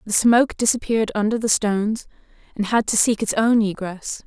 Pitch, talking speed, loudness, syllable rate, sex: 215 Hz, 185 wpm, -20 LUFS, 5.5 syllables/s, female